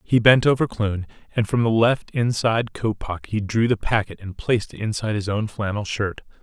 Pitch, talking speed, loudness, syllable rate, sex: 110 Hz, 215 wpm, -22 LUFS, 5.4 syllables/s, male